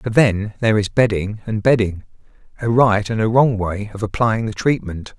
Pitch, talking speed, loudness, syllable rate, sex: 110 Hz, 185 wpm, -18 LUFS, 5.0 syllables/s, male